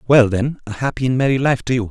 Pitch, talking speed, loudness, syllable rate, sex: 125 Hz, 285 wpm, -18 LUFS, 6.6 syllables/s, male